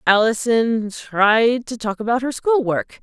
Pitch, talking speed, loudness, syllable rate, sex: 225 Hz, 160 wpm, -19 LUFS, 3.8 syllables/s, female